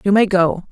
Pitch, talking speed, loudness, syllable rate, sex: 190 Hz, 250 wpm, -15 LUFS, 5.4 syllables/s, female